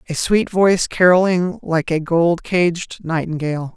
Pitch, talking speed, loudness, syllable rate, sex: 170 Hz, 145 wpm, -17 LUFS, 4.3 syllables/s, female